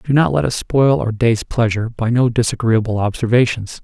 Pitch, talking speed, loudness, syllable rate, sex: 115 Hz, 190 wpm, -16 LUFS, 5.3 syllables/s, male